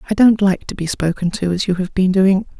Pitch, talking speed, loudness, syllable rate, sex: 190 Hz, 280 wpm, -17 LUFS, 5.7 syllables/s, female